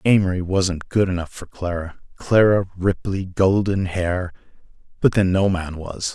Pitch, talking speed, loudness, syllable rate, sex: 95 Hz, 155 wpm, -21 LUFS, 4.5 syllables/s, male